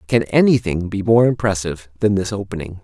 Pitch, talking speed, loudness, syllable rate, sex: 100 Hz, 170 wpm, -18 LUFS, 5.8 syllables/s, male